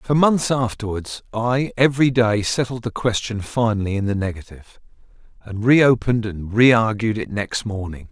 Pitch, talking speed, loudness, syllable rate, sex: 115 Hz, 150 wpm, -20 LUFS, 4.8 syllables/s, male